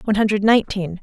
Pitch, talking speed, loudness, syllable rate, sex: 205 Hz, 175 wpm, -18 LUFS, 7.7 syllables/s, female